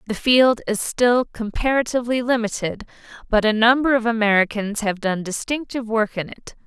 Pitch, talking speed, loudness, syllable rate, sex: 225 Hz, 155 wpm, -20 LUFS, 5.3 syllables/s, female